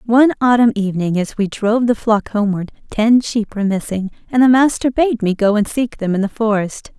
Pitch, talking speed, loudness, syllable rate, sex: 220 Hz, 215 wpm, -16 LUFS, 5.6 syllables/s, female